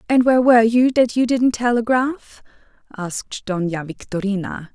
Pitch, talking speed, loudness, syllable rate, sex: 225 Hz, 140 wpm, -18 LUFS, 5.0 syllables/s, female